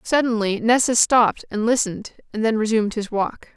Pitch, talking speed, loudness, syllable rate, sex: 225 Hz, 170 wpm, -20 LUFS, 5.6 syllables/s, female